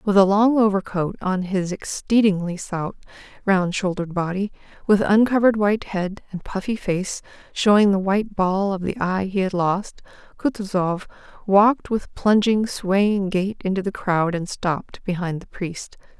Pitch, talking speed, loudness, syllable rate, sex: 195 Hz, 155 wpm, -21 LUFS, 4.6 syllables/s, female